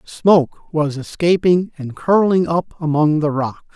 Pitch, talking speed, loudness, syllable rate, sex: 160 Hz, 145 wpm, -17 LUFS, 4.2 syllables/s, male